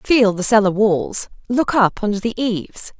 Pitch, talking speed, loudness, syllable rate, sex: 215 Hz, 180 wpm, -17 LUFS, 4.4 syllables/s, female